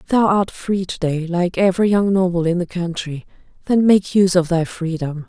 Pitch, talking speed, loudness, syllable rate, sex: 180 Hz, 205 wpm, -18 LUFS, 5.2 syllables/s, female